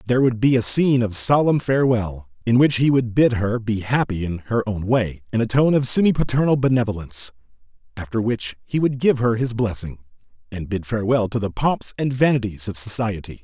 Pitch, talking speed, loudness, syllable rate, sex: 115 Hz, 200 wpm, -20 LUFS, 5.6 syllables/s, male